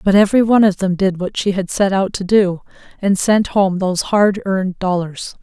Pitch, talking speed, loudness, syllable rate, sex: 195 Hz, 220 wpm, -16 LUFS, 5.3 syllables/s, female